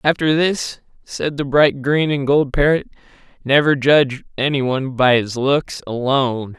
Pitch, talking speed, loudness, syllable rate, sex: 140 Hz, 155 wpm, -17 LUFS, 4.5 syllables/s, male